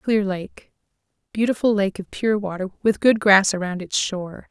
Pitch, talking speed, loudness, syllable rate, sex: 200 Hz, 160 wpm, -21 LUFS, 4.9 syllables/s, female